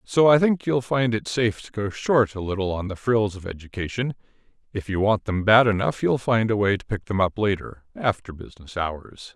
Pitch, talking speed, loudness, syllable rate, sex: 105 Hz, 225 wpm, -23 LUFS, 5.3 syllables/s, male